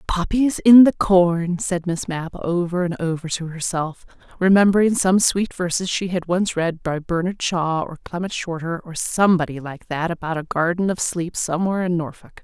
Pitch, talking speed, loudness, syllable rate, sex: 175 Hz, 185 wpm, -20 LUFS, 4.9 syllables/s, female